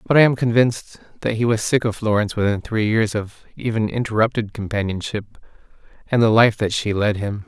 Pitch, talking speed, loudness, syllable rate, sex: 110 Hz, 195 wpm, -20 LUFS, 5.7 syllables/s, male